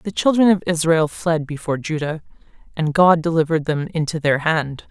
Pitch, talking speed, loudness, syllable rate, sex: 160 Hz, 170 wpm, -19 LUFS, 5.3 syllables/s, female